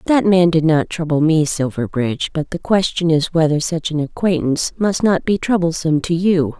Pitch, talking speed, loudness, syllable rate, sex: 165 Hz, 190 wpm, -17 LUFS, 5.2 syllables/s, female